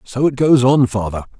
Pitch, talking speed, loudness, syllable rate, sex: 125 Hz, 215 wpm, -15 LUFS, 5.1 syllables/s, male